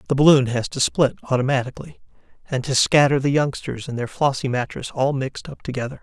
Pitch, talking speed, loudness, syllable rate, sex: 135 Hz, 190 wpm, -20 LUFS, 6.0 syllables/s, male